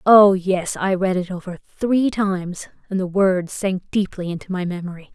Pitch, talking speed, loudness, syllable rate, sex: 185 Hz, 185 wpm, -20 LUFS, 4.8 syllables/s, female